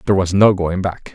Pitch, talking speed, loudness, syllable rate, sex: 95 Hz, 260 wpm, -16 LUFS, 6.1 syllables/s, male